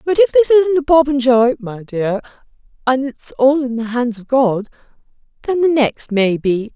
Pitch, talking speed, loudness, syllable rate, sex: 255 Hz, 170 wpm, -16 LUFS, 4.4 syllables/s, female